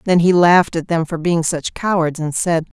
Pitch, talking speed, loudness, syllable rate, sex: 165 Hz, 235 wpm, -16 LUFS, 5.0 syllables/s, female